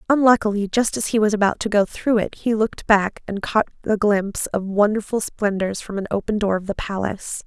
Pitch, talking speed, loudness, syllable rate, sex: 210 Hz, 215 wpm, -21 LUFS, 5.6 syllables/s, female